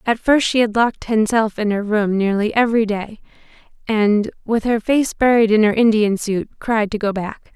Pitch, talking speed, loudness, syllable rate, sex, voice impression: 220 Hz, 205 wpm, -17 LUFS, 4.9 syllables/s, female, very feminine, slightly young, slightly adult-like, very thin, tensed, slightly weak, bright, slightly soft, clear, fluent, cute, slightly intellectual, refreshing, sincere, slightly calm, slightly reassuring, unique, slightly elegant, sweet, kind, slightly modest